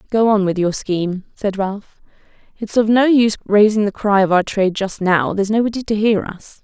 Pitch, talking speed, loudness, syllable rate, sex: 205 Hz, 215 wpm, -17 LUFS, 5.5 syllables/s, female